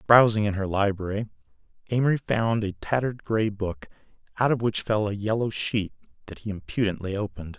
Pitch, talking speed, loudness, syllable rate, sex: 105 Hz, 165 wpm, -26 LUFS, 5.7 syllables/s, male